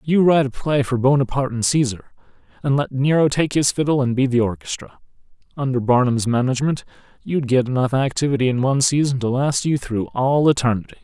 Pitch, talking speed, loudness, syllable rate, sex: 130 Hz, 185 wpm, -19 LUFS, 6.1 syllables/s, male